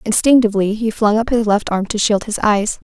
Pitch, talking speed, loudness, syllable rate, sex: 215 Hz, 225 wpm, -16 LUFS, 5.6 syllables/s, female